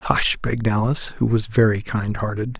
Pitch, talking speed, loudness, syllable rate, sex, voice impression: 110 Hz, 185 wpm, -21 LUFS, 5.2 syllables/s, male, masculine, middle-aged, relaxed, bright, muffled, very raspy, calm, mature, friendly, wild, slightly lively, slightly strict